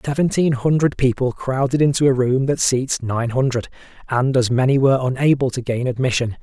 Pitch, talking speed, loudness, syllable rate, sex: 130 Hz, 175 wpm, -18 LUFS, 5.5 syllables/s, male